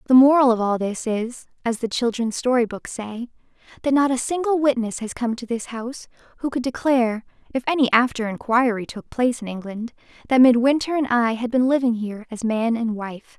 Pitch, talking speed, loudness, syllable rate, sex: 240 Hz, 195 wpm, -21 LUFS, 5.1 syllables/s, female